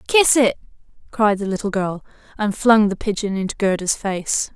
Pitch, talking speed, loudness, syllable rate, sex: 205 Hz, 170 wpm, -19 LUFS, 4.8 syllables/s, female